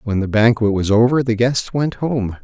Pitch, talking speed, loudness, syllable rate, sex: 115 Hz, 220 wpm, -17 LUFS, 4.7 syllables/s, male